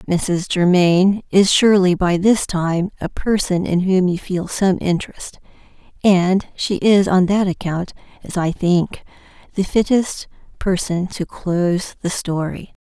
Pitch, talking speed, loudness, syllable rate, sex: 185 Hz, 145 wpm, -18 LUFS, 4.0 syllables/s, female